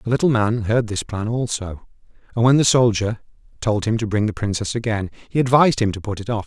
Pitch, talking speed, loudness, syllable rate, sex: 110 Hz, 230 wpm, -20 LUFS, 5.9 syllables/s, male